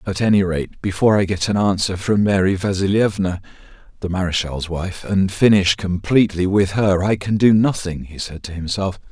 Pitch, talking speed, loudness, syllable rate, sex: 95 Hz, 180 wpm, -18 LUFS, 5.0 syllables/s, male